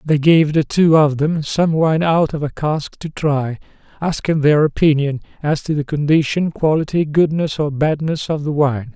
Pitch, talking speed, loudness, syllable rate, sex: 150 Hz, 190 wpm, -17 LUFS, 4.5 syllables/s, male